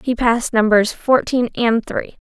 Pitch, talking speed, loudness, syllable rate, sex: 230 Hz, 160 wpm, -17 LUFS, 4.4 syllables/s, female